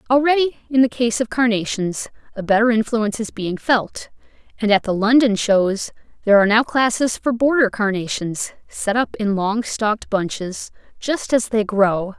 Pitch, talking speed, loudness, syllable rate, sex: 220 Hz, 165 wpm, -19 LUFS, 4.8 syllables/s, female